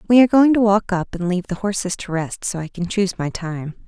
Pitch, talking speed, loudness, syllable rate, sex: 190 Hz, 280 wpm, -19 LUFS, 6.2 syllables/s, female